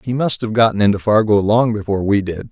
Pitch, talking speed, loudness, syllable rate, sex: 105 Hz, 240 wpm, -16 LUFS, 6.2 syllables/s, male